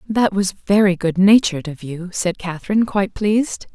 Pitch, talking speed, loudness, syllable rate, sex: 195 Hz, 160 wpm, -18 LUFS, 5.4 syllables/s, female